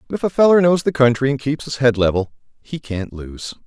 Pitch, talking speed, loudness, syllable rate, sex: 130 Hz, 245 wpm, -17 LUFS, 5.8 syllables/s, male